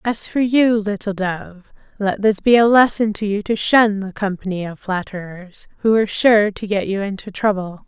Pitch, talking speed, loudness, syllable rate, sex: 205 Hz, 200 wpm, -18 LUFS, 4.8 syllables/s, female